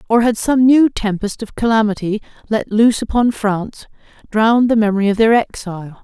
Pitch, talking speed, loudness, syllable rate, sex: 220 Hz, 170 wpm, -15 LUFS, 5.7 syllables/s, female